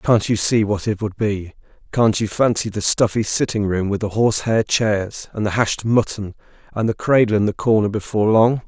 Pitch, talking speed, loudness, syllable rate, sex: 105 Hz, 205 wpm, -19 LUFS, 5.1 syllables/s, male